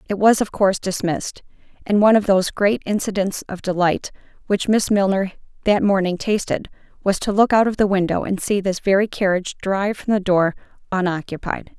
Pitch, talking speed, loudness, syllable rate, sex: 195 Hz, 180 wpm, -19 LUFS, 5.7 syllables/s, female